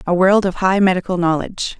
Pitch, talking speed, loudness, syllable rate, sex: 185 Hz, 200 wpm, -16 LUFS, 6.1 syllables/s, female